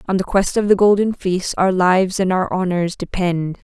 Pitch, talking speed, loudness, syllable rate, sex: 185 Hz, 210 wpm, -17 LUFS, 5.3 syllables/s, female